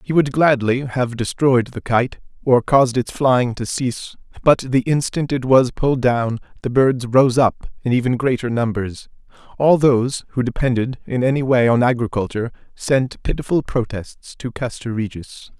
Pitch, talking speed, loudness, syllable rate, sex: 125 Hz, 165 wpm, -18 LUFS, 4.8 syllables/s, male